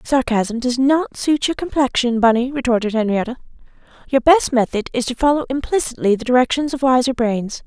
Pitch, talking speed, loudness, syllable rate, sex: 255 Hz, 165 wpm, -18 LUFS, 5.5 syllables/s, female